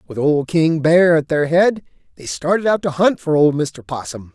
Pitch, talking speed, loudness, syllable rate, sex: 155 Hz, 220 wpm, -16 LUFS, 4.7 syllables/s, male